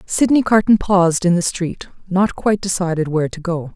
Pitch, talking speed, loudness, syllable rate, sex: 185 Hz, 190 wpm, -17 LUFS, 5.5 syllables/s, female